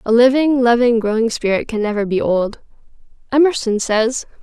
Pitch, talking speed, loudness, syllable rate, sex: 235 Hz, 150 wpm, -16 LUFS, 5.2 syllables/s, female